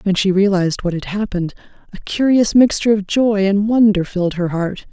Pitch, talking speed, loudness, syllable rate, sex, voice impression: 200 Hz, 195 wpm, -16 LUFS, 5.7 syllables/s, female, very feminine, very middle-aged, thin, relaxed, weak, slightly bright, very soft, very clear, very fluent, cool, very intellectual, very refreshing, sincere, calm, friendly, very reassuring, very unique, elegant, very sweet, lively, kind